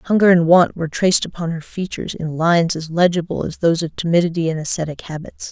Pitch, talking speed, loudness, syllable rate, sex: 170 Hz, 205 wpm, -18 LUFS, 6.4 syllables/s, female